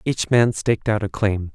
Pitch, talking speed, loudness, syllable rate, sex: 105 Hz, 235 wpm, -20 LUFS, 4.9 syllables/s, male